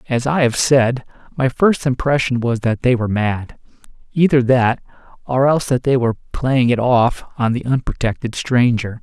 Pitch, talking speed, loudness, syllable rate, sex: 125 Hz, 175 wpm, -17 LUFS, 4.8 syllables/s, male